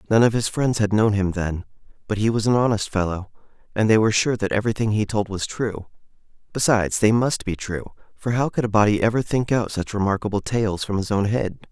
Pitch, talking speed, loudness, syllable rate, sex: 105 Hz, 225 wpm, -22 LUFS, 5.8 syllables/s, male